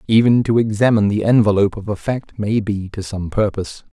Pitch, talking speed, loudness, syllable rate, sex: 105 Hz, 195 wpm, -17 LUFS, 5.9 syllables/s, male